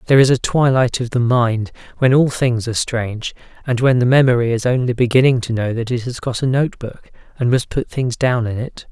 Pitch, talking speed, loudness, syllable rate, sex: 125 Hz, 230 wpm, -17 LUFS, 5.7 syllables/s, male